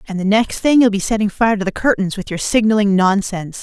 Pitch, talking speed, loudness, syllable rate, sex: 205 Hz, 250 wpm, -16 LUFS, 6.1 syllables/s, female